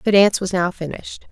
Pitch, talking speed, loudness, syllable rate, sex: 190 Hz, 230 wpm, -19 LUFS, 6.7 syllables/s, female